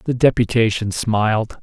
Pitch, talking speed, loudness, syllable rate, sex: 115 Hz, 110 wpm, -18 LUFS, 4.4 syllables/s, male